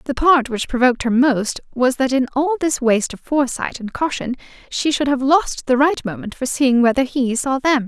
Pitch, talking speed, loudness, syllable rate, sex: 260 Hz, 220 wpm, -18 LUFS, 5.2 syllables/s, female